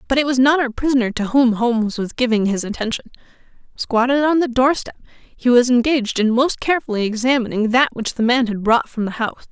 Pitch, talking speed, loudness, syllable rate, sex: 245 Hz, 210 wpm, -18 LUFS, 6.0 syllables/s, female